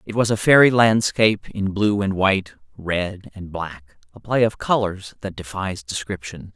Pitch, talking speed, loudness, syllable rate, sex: 100 Hz, 175 wpm, -20 LUFS, 4.5 syllables/s, male